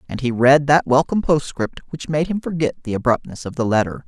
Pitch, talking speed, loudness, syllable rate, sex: 140 Hz, 220 wpm, -19 LUFS, 5.9 syllables/s, male